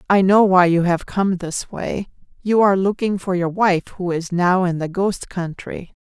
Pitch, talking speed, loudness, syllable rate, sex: 185 Hz, 210 wpm, -19 LUFS, 4.6 syllables/s, female